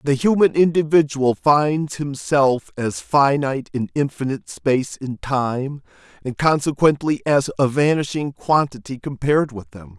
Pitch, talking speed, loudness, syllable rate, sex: 140 Hz, 125 wpm, -19 LUFS, 4.5 syllables/s, male